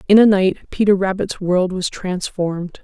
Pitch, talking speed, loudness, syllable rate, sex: 190 Hz, 170 wpm, -18 LUFS, 4.8 syllables/s, female